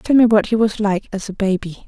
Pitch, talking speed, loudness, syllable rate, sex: 205 Hz, 290 wpm, -17 LUFS, 5.6 syllables/s, female